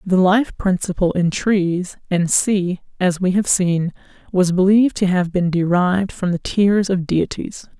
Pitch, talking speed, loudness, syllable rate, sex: 185 Hz, 170 wpm, -18 LUFS, 4.2 syllables/s, female